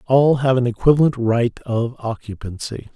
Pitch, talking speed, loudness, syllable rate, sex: 125 Hz, 140 wpm, -19 LUFS, 4.1 syllables/s, male